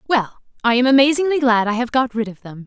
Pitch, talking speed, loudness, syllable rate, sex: 240 Hz, 245 wpm, -17 LUFS, 6.1 syllables/s, female